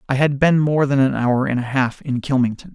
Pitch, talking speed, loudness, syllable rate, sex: 135 Hz, 260 wpm, -18 LUFS, 5.5 syllables/s, male